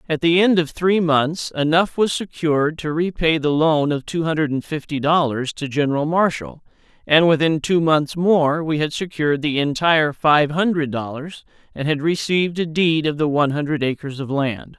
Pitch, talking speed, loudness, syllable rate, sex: 155 Hz, 190 wpm, -19 LUFS, 5.0 syllables/s, male